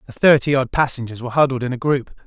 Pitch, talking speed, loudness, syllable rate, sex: 130 Hz, 240 wpm, -18 LUFS, 7.0 syllables/s, male